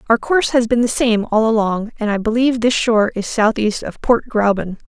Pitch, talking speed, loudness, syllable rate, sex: 225 Hz, 220 wpm, -16 LUFS, 5.5 syllables/s, female